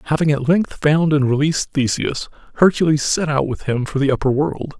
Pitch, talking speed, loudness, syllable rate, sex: 150 Hz, 200 wpm, -18 LUFS, 5.4 syllables/s, male